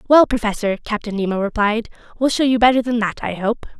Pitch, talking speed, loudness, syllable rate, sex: 225 Hz, 205 wpm, -18 LUFS, 6.1 syllables/s, female